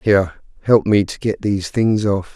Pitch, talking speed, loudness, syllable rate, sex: 105 Hz, 205 wpm, -18 LUFS, 5.0 syllables/s, male